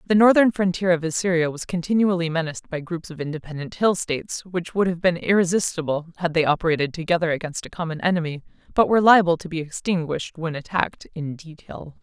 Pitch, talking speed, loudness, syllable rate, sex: 170 Hz, 185 wpm, -22 LUFS, 6.3 syllables/s, female